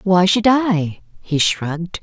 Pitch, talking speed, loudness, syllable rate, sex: 185 Hz, 150 wpm, -17 LUFS, 3.8 syllables/s, female